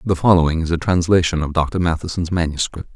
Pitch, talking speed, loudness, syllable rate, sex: 85 Hz, 185 wpm, -18 LUFS, 6.3 syllables/s, male